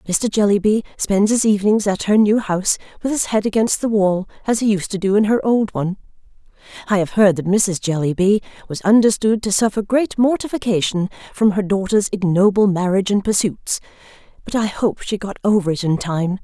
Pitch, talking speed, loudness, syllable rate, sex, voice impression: 200 Hz, 190 wpm, -18 LUFS, 5.5 syllables/s, female, feminine, gender-neutral, very adult-like, middle-aged, slightly thin, slightly relaxed, slightly weak, slightly bright, very soft, clear, fluent, slightly raspy, cute, slightly cool, intellectual, refreshing, very sincere, very calm, very friendly, very reassuring, unique, very elegant, slightly wild, sweet, lively, very kind, slightly intense, modest